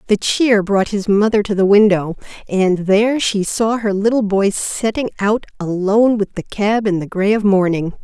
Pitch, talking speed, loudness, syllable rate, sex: 205 Hz, 195 wpm, -16 LUFS, 4.7 syllables/s, female